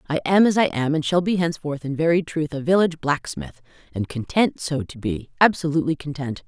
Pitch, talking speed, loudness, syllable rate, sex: 150 Hz, 185 wpm, -22 LUFS, 5.8 syllables/s, female